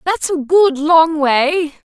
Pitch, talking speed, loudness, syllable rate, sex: 315 Hz, 160 wpm, -14 LUFS, 3.0 syllables/s, female